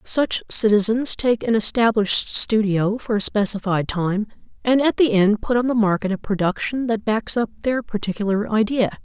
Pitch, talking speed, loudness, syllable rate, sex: 215 Hz, 175 wpm, -19 LUFS, 4.9 syllables/s, female